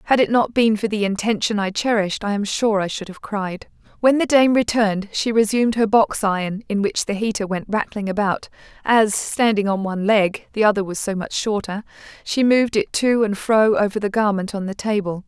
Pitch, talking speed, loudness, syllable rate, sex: 210 Hz, 210 wpm, -20 LUFS, 5.4 syllables/s, female